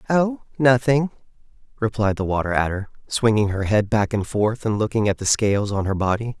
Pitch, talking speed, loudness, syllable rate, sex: 110 Hz, 190 wpm, -21 LUFS, 5.3 syllables/s, male